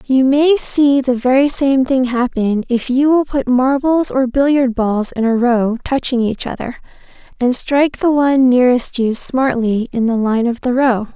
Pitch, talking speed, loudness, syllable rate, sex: 255 Hz, 190 wpm, -15 LUFS, 4.5 syllables/s, female